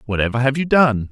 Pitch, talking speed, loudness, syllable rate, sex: 125 Hz, 215 wpm, -17 LUFS, 6.2 syllables/s, male